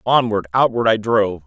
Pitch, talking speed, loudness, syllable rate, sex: 110 Hz, 165 wpm, -17 LUFS, 5.5 syllables/s, male